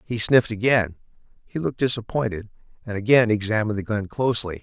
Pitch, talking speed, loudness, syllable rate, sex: 110 Hz, 155 wpm, -22 LUFS, 6.5 syllables/s, male